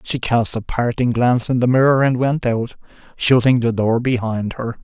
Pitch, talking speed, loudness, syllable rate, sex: 120 Hz, 200 wpm, -17 LUFS, 4.9 syllables/s, male